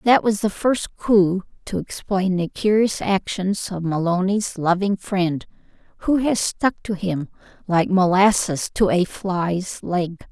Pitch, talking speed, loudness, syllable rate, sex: 190 Hz, 145 wpm, -21 LUFS, 3.7 syllables/s, female